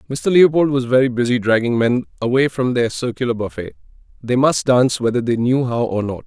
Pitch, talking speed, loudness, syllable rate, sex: 125 Hz, 190 wpm, -17 LUFS, 5.7 syllables/s, male